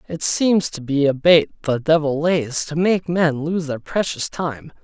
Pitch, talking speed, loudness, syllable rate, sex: 155 Hz, 200 wpm, -19 LUFS, 4.1 syllables/s, male